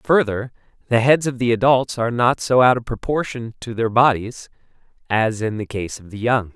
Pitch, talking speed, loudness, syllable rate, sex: 120 Hz, 200 wpm, -19 LUFS, 5.1 syllables/s, male